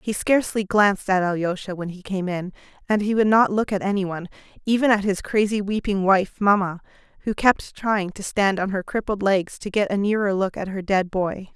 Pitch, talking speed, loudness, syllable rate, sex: 195 Hz, 220 wpm, -22 LUFS, 5.4 syllables/s, female